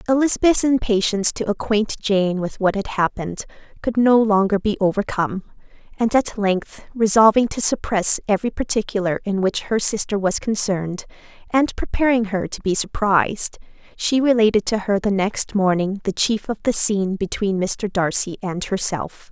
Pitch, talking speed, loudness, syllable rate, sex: 205 Hz, 160 wpm, -20 LUFS, 5.0 syllables/s, female